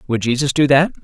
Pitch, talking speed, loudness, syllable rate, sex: 135 Hz, 235 wpm, -16 LUFS, 6.4 syllables/s, male